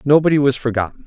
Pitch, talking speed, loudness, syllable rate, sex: 135 Hz, 170 wpm, -16 LUFS, 7.2 syllables/s, male